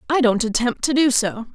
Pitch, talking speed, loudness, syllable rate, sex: 250 Hz, 235 wpm, -19 LUFS, 5.3 syllables/s, female